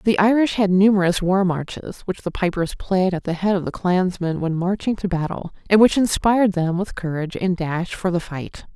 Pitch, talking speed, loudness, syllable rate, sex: 185 Hz, 210 wpm, -20 LUFS, 5.2 syllables/s, female